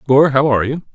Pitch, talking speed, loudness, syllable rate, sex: 135 Hz, 255 wpm, -14 LUFS, 6.7 syllables/s, male